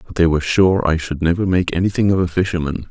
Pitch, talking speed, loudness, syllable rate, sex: 85 Hz, 250 wpm, -17 LUFS, 6.6 syllables/s, male